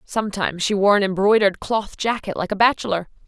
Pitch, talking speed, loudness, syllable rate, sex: 200 Hz, 185 wpm, -20 LUFS, 6.3 syllables/s, female